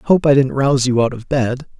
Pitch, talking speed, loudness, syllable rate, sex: 130 Hz, 270 wpm, -16 LUFS, 5.6 syllables/s, male